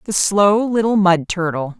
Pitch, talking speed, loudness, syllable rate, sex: 190 Hz, 165 wpm, -16 LUFS, 4.2 syllables/s, female